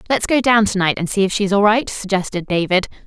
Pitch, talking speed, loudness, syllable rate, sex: 200 Hz, 255 wpm, -17 LUFS, 5.9 syllables/s, female